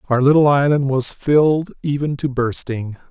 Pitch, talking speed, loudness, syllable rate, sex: 140 Hz, 155 wpm, -17 LUFS, 4.6 syllables/s, male